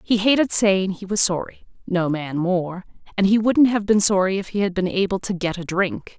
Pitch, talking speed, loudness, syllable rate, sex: 190 Hz, 235 wpm, -20 LUFS, 5.1 syllables/s, female